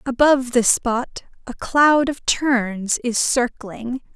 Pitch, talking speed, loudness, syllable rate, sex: 250 Hz, 130 wpm, -19 LUFS, 3.4 syllables/s, female